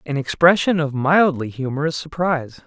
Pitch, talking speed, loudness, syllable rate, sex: 150 Hz, 135 wpm, -19 LUFS, 5.2 syllables/s, male